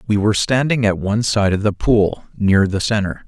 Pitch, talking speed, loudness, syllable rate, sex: 105 Hz, 220 wpm, -17 LUFS, 5.4 syllables/s, male